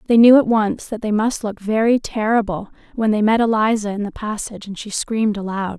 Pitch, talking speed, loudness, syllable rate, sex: 215 Hz, 220 wpm, -18 LUFS, 5.6 syllables/s, female